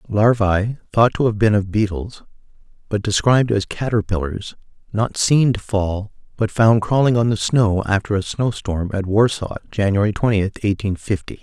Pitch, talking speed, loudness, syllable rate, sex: 105 Hz, 160 wpm, -19 LUFS, 4.9 syllables/s, male